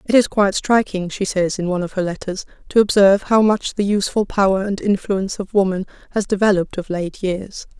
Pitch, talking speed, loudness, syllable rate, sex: 195 Hz, 210 wpm, -18 LUFS, 5.9 syllables/s, female